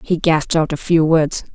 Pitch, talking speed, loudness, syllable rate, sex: 160 Hz, 235 wpm, -16 LUFS, 5.1 syllables/s, female